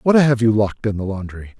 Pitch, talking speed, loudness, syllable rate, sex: 110 Hz, 265 wpm, -18 LUFS, 6.4 syllables/s, male